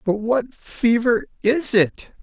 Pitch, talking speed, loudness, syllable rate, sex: 230 Hz, 135 wpm, -20 LUFS, 3.2 syllables/s, male